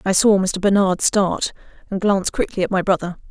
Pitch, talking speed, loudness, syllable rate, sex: 190 Hz, 200 wpm, -19 LUFS, 5.5 syllables/s, female